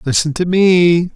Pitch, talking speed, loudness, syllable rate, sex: 170 Hz, 155 wpm, -13 LUFS, 3.9 syllables/s, male